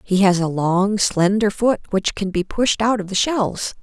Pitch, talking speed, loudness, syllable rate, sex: 200 Hz, 220 wpm, -19 LUFS, 4.2 syllables/s, female